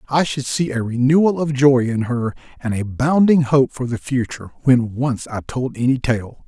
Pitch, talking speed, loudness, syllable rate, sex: 130 Hz, 205 wpm, -18 LUFS, 4.7 syllables/s, male